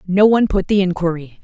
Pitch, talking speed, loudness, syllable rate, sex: 185 Hz, 210 wpm, -16 LUFS, 6.2 syllables/s, female